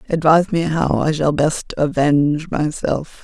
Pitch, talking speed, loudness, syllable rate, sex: 155 Hz, 150 wpm, -17 LUFS, 4.3 syllables/s, female